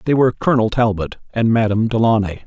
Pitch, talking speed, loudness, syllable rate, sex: 110 Hz, 170 wpm, -17 LUFS, 6.9 syllables/s, male